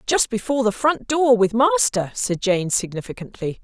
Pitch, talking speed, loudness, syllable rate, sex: 225 Hz, 150 wpm, -20 LUFS, 4.9 syllables/s, female